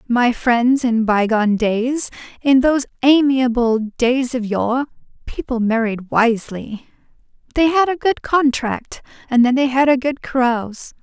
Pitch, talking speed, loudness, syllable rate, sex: 250 Hz, 140 wpm, -17 LUFS, 4.2 syllables/s, female